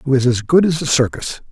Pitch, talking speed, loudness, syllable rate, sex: 140 Hz, 280 wpm, -16 LUFS, 5.7 syllables/s, male